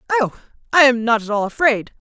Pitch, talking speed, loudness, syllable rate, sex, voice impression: 245 Hz, 170 wpm, -17 LUFS, 5.0 syllables/s, female, feminine, very adult-like, slightly powerful, slightly muffled, slightly friendly, slightly sharp